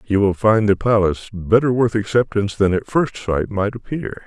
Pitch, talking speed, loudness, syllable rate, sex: 105 Hz, 195 wpm, -18 LUFS, 5.2 syllables/s, male